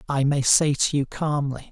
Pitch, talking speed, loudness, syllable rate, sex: 140 Hz, 210 wpm, -22 LUFS, 4.6 syllables/s, male